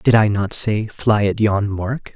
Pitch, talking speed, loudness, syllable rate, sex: 105 Hz, 225 wpm, -18 LUFS, 3.9 syllables/s, male